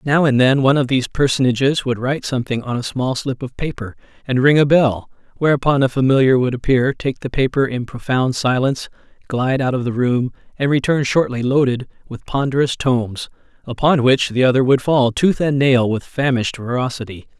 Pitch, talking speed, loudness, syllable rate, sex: 130 Hz, 190 wpm, -17 LUFS, 5.6 syllables/s, male